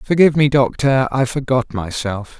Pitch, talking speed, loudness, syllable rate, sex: 130 Hz, 150 wpm, -17 LUFS, 4.9 syllables/s, male